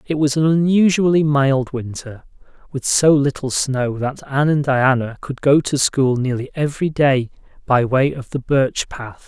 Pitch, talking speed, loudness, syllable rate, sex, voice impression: 140 Hz, 175 wpm, -17 LUFS, 4.5 syllables/s, male, masculine, adult-like, slightly soft, sincere, slightly friendly, reassuring, slightly kind